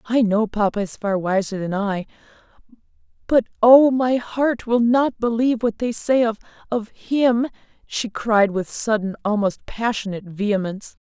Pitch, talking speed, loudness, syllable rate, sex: 220 Hz, 145 wpm, -20 LUFS, 4.6 syllables/s, female